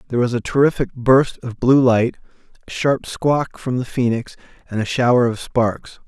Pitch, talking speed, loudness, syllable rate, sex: 125 Hz, 190 wpm, -18 LUFS, 4.8 syllables/s, male